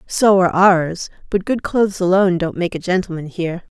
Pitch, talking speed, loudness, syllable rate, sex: 180 Hz, 190 wpm, -17 LUFS, 5.7 syllables/s, female